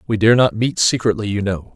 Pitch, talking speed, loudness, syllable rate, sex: 105 Hz, 240 wpm, -17 LUFS, 5.7 syllables/s, male